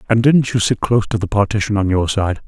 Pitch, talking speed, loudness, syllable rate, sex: 105 Hz, 265 wpm, -16 LUFS, 6.3 syllables/s, male